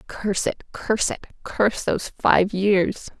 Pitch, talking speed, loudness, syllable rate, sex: 200 Hz, 150 wpm, -22 LUFS, 4.5 syllables/s, female